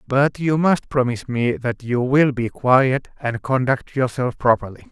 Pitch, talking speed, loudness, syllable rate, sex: 130 Hz, 170 wpm, -19 LUFS, 4.3 syllables/s, male